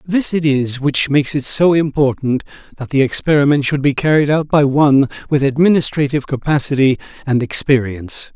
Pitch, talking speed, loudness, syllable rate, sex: 140 Hz, 160 wpm, -15 LUFS, 5.6 syllables/s, male